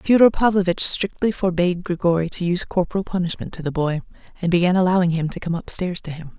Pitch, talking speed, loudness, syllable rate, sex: 180 Hz, 195 wpm, -21 LUFS, 6.4 syllables/s, female